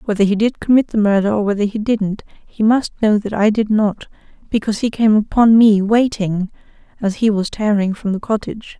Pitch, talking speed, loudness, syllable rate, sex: 210 Hz, 205 wpm, -16 LUFS, 5.4 syllables/s, female